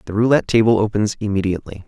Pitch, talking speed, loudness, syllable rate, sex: 105 Hz, 160 wpm, -18 LUFS, 7.7 syllables/s, male